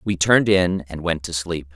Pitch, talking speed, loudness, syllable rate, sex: 85 Hz, 240 wpm, -20 LUFS, 5.0 syllables/s, male